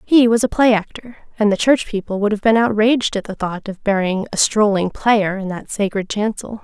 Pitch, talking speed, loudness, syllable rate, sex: 210 Hz, 225 wpm, -17 LUFS, 5.3 syllables/s, female